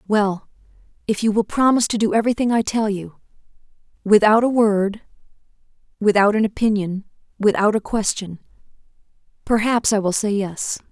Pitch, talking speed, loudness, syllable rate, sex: 210 Hz, 135 wpm, -19 LUFS, 5.3 syllables/s, female